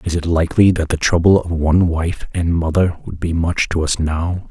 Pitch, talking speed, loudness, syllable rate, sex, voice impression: 85 Hz, 225 wpm, -17 LUFS, 5.2 syllables/s, male, very masculine, very middle-aged, very thick, relaxed, very powerful, dark, soft, very muffled, slightly fluent, raspy, very cool, intellectual, sincere, very calm, very mature, very friendly, reassuring, very unique, elegant, very wild, sweet, very kind, very modest